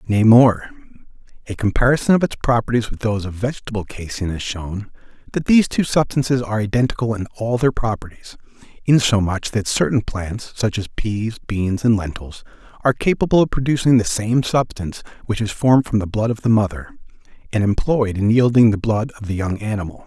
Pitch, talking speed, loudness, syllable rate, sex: 110 Hz, 175 wpm, -19 LUFS, 5.8 syllables/s, male